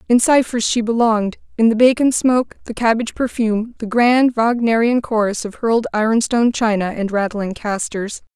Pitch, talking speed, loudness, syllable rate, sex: 225 Hz, 150 wpm, -17 LUFS, 5.4 syllables/s, female